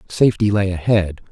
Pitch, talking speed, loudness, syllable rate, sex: 100 Hz, 135 wpm, -17 LUFS, 5.5 syllables/s, male